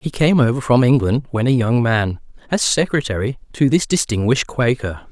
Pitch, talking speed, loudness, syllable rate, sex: 125 Hz, 175 wpm, -17 LUFS, 5.2 syllables/s, male